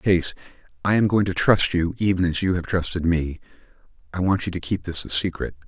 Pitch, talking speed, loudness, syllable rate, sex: 90 Hz, 235 wpm, -22 LUFS, 5.9 syllables/s, male